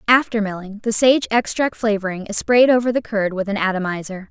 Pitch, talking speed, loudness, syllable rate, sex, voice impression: 210 Hz, 195 wpm, -18 LUFS, 5.6 syllables/s, female, very feminine, slightly young, slightly fluent, slightly cute, slightly refreshing, friendly, slightly lively